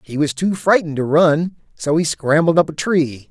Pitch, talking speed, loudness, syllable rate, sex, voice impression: 160 Hz, 220 wpm, -17 LUFS, 5.0 syllables/s, male, very masculine, middle-aged, slightly thick, tensed, very powerful, very bright, slightly hard, very clear, very fluent, raspy, cool, very intellectual, refreshing, very sincere, calm, mature, very friendly, very reassuring, very unique, slightly elegant, wild, slightly sweet, very lively, slightly kind, intense